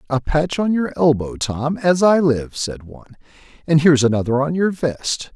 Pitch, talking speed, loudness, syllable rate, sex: 145 Hz, 190 wpm, -18 LUFS, 4.9 syllables/s, male